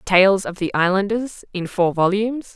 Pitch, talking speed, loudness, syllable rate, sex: 195 Hz, 165 wpm, -19 LUFS, 4.6 syllables/s, female